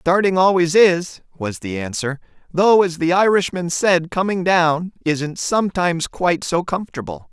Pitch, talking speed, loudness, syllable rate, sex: 170 Hz, 150 wpm, -18 LUFS, 4.6 syllables/s, male